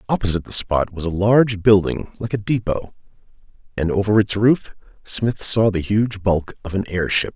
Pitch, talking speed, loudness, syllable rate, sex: 100 Hz, 180 wpm, -19 LUFS, 5.1 syllables/s, male